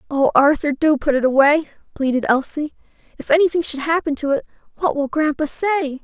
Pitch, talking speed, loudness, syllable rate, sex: 295 Hz, 180 wpm, -18 LUFS, 5.6 syllables/s, female